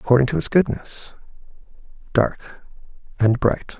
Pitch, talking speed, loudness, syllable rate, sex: 130 Hz, 110 wpm, -21 LUFS, 4.8 syllables/s, male